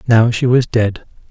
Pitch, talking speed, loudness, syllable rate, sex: 115 Hz, 185 wpm, -14 LUFS, 4.3 syllables/s, male